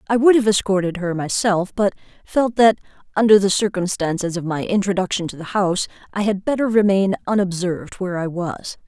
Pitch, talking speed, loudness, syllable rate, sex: 195 Hz, 175 wpm, -19 LUFS, 5.7 syllables/s, female